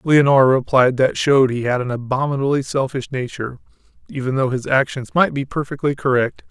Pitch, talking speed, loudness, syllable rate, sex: 135 Hz, 165 wpm, -18 LUFS, 5.8 syllables/s, male